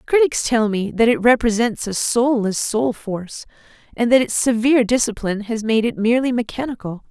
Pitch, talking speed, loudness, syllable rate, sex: 230 Hz, 170 wpm, -18 LUFS, 5.5 syllables/s, female